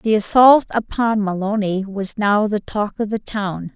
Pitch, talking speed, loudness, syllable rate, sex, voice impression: 205 Hz, 175 wpm, -18 LUFS, 4.1 syllables/s, female, feminine, adult-like, slightly bright, halting, calm, friendly, unique, slightly kind, modest